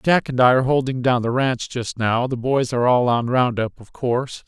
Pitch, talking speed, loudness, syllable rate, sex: 125 Hz, 240 wpm, -20 LUFS, 5.3 syllables/s, male